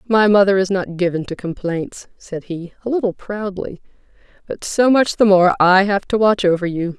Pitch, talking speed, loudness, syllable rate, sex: 195 Hz, 200 wpm, -17 LUFS, 4.9 syllables/s, female